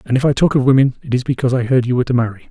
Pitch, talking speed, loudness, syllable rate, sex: 125 Hz, 360 wpm, -16 LUFS, 8.5 syllables/s, male